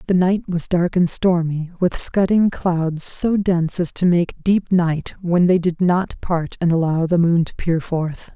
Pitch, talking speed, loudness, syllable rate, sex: 175 Hz, 200 wpm, -19 LUFS, 4.0 syllables/s, female